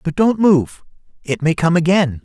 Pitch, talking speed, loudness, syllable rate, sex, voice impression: 170 Hz, 190 wpm, -16 LUFS, 4.7 syllables/s, male, adult-like, slightly middle-aged, slightly thick, tensed, slightly powerful, bright, hard, very clear, fluent, slightly raspy, intellectual, refreshing, very sincere, very calm, friendly, reassuring, very unique, slightly elegant, slightly sweet, very lively, kind, slightly intense, very sharp, slightly modest, light